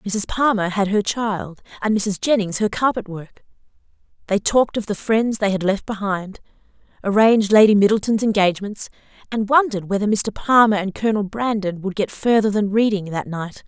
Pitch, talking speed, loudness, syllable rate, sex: 205 Hz, 170 wpm, -19 LUFS, 5.3 syllables/s, female